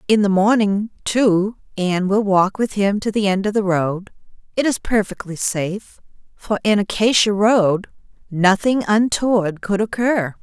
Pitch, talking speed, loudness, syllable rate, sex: 205 Hz, 155 wpm, -18 LUFS, 4.4 syllables/s, female